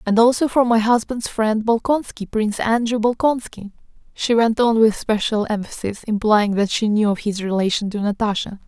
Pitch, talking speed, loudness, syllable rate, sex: 220 Hz, 175 wpm, -19 LUFS, 5.1 syllables/s, female